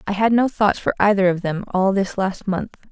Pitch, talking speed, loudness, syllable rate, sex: 195 Hz, 245 wpm, -19 LUFS, 5.2 syllables/s, female